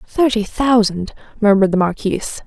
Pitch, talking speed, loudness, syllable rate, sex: 215 Hz, 120 wpm, -16 LUFS, 5.4 syllables/s, female